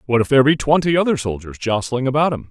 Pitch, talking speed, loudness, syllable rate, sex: 130 Hz, 240 wpm, -17 LUFS, 6.8 syllables/s, male